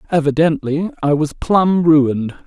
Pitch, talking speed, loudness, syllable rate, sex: 155 Hz, 120 wpm, -16 LUFS, 4.3 syllables/s, male